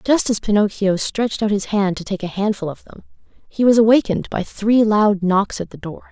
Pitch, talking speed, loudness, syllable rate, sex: 205 Hz, 225 wpm, -18 LUFS, 5.4 syllables/s, female